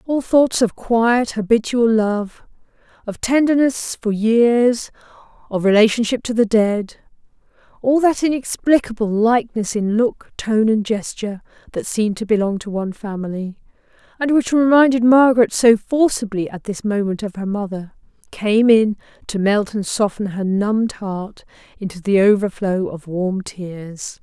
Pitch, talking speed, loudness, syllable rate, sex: 215 Hz, 140 wpm, -18 LUFS, 4.5 syllables/s, female